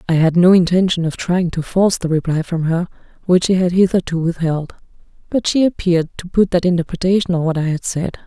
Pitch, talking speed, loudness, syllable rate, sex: 175 Hz, 210 wpm, -16 LUFS, 6.0 syllables/s, female